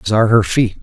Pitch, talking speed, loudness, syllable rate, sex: 110 Hz, 290 wpm, -14 LUFS, 7.5 syllables/s, male